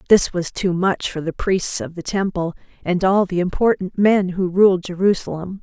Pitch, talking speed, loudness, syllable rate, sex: 185 Hz, 190 wpm, -19 LUFS, 4.7 syllables/s, female